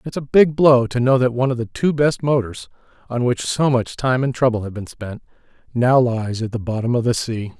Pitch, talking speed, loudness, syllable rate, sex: 125 Hz, 245 wpm, -18 LUFS, 5.4 syllables/s, male